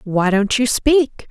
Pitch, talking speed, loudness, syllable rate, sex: 230 Hz, 185 wpm, -16 LUFS, 3.3 syllables/s, female